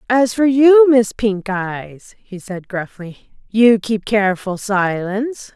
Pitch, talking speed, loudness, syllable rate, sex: 215 Hz, 140 wpm, -16 LUFS, 3.5 syllables/s, female